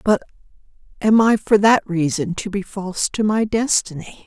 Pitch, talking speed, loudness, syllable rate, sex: 200 Hz, 170 wpm, -18 LUFS, 4.8 syllables/s, female